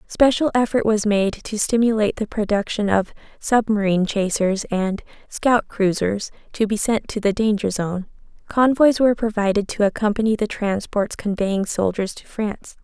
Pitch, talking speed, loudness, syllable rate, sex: 210 Hz, 150 wpm, -20 LUFS, 4.9 syllables/s, female